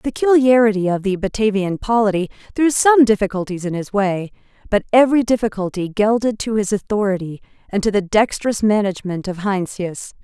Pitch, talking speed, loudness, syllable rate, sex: 210 Hz, 150 wpm, -18 LUFS, 5.7 syllables/s, female